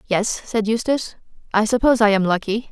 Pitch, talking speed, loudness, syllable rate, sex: 220 Hz, 175 wpm, -19 LUFS, 6.0 syllables/s, female